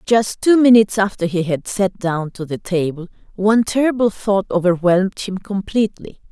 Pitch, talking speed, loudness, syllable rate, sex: 195 Hz, 160 wpm, -17 LUFS, 5.2 syllables/s, female